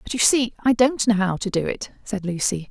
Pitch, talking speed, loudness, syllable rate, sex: 215 Hz, 265 wpm, -21 LUFS, 5.3 syllables/s, female